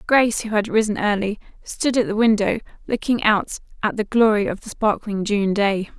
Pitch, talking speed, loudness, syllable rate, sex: 210 Hz, 190 wpm, -20 LUFS, 5.2 syllables/s, female